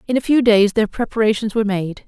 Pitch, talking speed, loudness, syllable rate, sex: 215 Hz, 230 wpm, -17 LUFS, 6.3 syllables/s, female